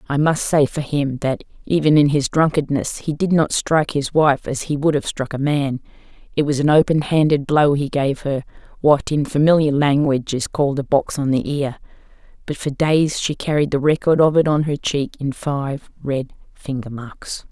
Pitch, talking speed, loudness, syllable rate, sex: 145 Hz, 205 wpm, -19 LUFS, 4.9 syllables/s, female